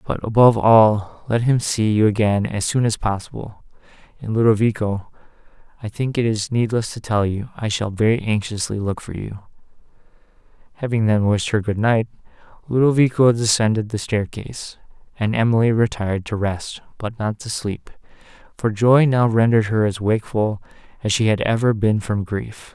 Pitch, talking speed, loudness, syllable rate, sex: 110 Hz, 165 wpm, -19 LUFS, 5.1 syllables/s, male